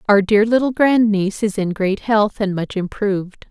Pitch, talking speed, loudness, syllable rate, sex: 205 Hz, 205 wpm, -17 LUFS, 4.9 syllables/s, female